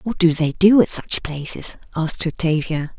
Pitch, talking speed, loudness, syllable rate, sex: 170 Hz, 180 wpm, -19 LUFS, 4.8 syllables/s, female